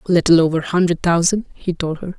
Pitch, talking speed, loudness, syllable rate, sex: 170 Hz, 245 wpm, -17 LUFS, 6.5 syllables/s, female